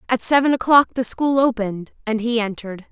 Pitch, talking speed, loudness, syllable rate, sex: 235 Hz, 185 wpm, -18 LUFS, 5.8 syllables/s, female